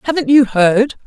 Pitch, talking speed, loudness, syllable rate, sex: 245 Hz, 170 wpm, -12 LUFS, 4.8 syllables/s, female